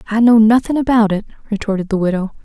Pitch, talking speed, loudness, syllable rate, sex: 215 Hz, 195 wpm, -14 LUFS, 6.8 syllables/s, female